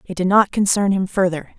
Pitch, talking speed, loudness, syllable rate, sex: 190 Hz, 225 wpm, -18 LUFS, 5.4 syllables/s, female